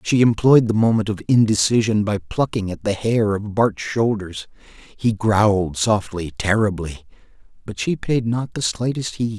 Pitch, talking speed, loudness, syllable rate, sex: 110 Hz, 160 wpm, -19 LUFS, 4.5 syllables/s, male